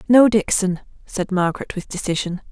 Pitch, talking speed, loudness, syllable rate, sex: 195 Hz, 145 wpm, -20 LUFS, 5.3 syllables/s, female